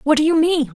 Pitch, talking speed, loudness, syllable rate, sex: 295 Hz, 305 wpm, -16 LUFS, 6.1 syllables/s, female